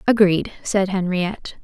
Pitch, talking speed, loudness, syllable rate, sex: 190 Hz, 110 wpm, -20 LUFS, 4.5 syllables/s, female